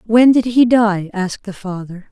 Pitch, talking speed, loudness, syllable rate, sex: 210 Hz, 200 wpm, -14 LUFS, 4.6 syllables/s, female